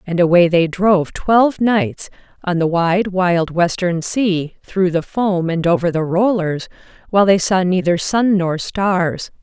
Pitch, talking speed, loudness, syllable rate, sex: 180 Hz, 165 wpm, -16 LUFS, 4.0 syllables/s, female